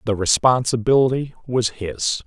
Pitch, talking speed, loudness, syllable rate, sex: 115 Hz, 105 wpm, -19 LUFS, 4.6 syllables/s, male